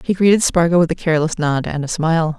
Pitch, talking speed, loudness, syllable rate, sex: 165 Hz, 250 wpm, -16 LUFS, 6.6 syllables/s, female